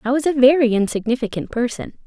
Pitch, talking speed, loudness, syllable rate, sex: 250 Hz, 175 wpm, -18 LUFS, 6.3 syllables/s, female